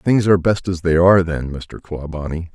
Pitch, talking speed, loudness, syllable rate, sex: 85 Hz, 210 wpm, -17 LUFS, 5.3 syllables/s, male